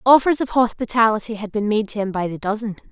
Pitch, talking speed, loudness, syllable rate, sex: 220 Hz, 225 wpm, -20 LUFS, 6.3 syllables/s, female